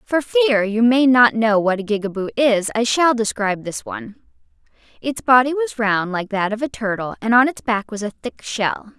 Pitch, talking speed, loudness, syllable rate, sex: 230 Hz, 215 wpm, -18 LUFS, 4.9 syllables/s, female